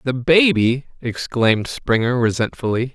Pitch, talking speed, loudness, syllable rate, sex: 125 Hz, 100 wpm, -18 LUFS, 4.5 syllables/s, male